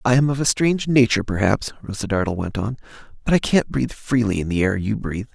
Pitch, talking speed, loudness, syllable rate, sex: 115 Hz, 235 wpm, -21 LUFS, 6.5 syllables/s, male